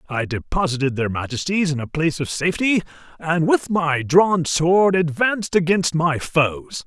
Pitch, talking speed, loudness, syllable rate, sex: 160 Hz, 155 wpm, -19 LUFS, 4.6 syllables/s, male